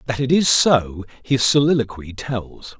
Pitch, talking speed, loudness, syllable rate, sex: 120 Hz, 150 wpm, -18 LUFS, 4.1 syllables/s, male